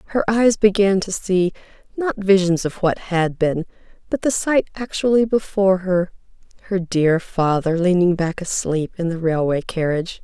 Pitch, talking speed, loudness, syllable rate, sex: 185 Hz, 160 wpm, -19 LUFS, 4.7 syllables/s, female